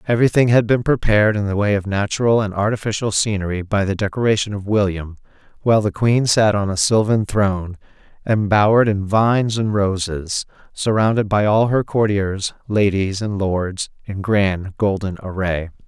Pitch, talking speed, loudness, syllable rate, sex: 105 Hz, 160 wpm, -18 LUFS, 5.1 syllables/s, male